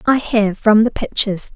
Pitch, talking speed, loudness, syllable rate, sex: 215 Hz, 190 wpm, -16 LUFS, 4.9 syllables/s, female